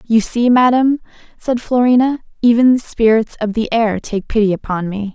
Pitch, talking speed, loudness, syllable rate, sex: 230 Hz, 175 wpm, -15 LUFS, 5.0 syllables/s, female